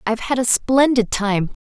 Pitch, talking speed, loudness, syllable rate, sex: 235 Hz, 185 wpm, -18 LUFS, 4.9 syllables/s, female